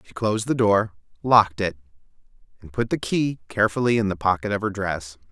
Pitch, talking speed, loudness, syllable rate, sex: 105 Hz, 190 wpm, -22 LUFS, 6.0 syllables/s, male